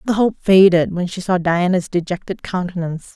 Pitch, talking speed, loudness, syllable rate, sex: 180 Hz, 190 wpm, -17 LUFS, 5.7 syllables/s, female